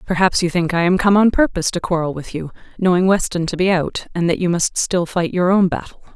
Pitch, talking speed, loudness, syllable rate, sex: 175 Hz, 255 wpm, -17 LUFS, 5.9 syllables/s, female